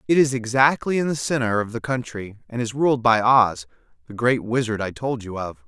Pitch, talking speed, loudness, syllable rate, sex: 120 Hz, 220 wpm, -21 LUFS, 5.2 syllables/s, male